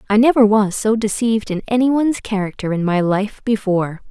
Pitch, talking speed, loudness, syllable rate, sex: 215 Hz, 175 wpm, -17 LUFS, 5.5 syllables/s, female